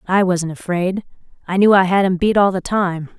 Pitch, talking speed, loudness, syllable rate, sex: 185 Hz, 225 wpm, -17 LUFS, 5.1 syllables/s, female